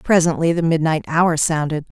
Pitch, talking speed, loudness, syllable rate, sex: 160 Hz, 150 wpm, -18 LUFS, 5.0 syllables/s, female